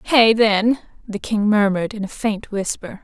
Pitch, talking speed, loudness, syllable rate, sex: 210 Hz, 180 wpm, -19 LUFS, 4.5 syllables/s, female